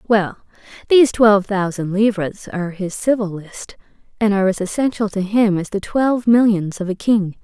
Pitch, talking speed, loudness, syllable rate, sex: 205 Hz, 180 wpm, -17 LUFS, 5.2 syllables/s, female